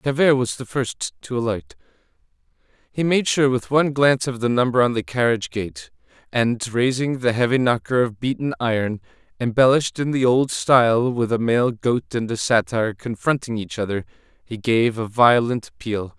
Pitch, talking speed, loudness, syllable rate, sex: 120 Hz, 175 wpm, -20 LUFS, 5.0 syllables/s, male